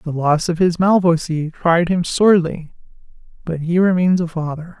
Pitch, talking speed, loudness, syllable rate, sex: 170 Hz, 150 wpm, -17 LUFS, 4.7 syllables/s, female